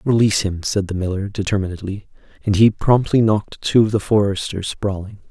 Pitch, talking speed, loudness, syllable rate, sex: 100 Hz, 170 wpm, -19 LUFS, 5.6 syllables/s, male